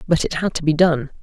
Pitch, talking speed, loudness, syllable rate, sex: 160 Hz, 295 wpm, -18 LUFS, 6.1 syllables/s, female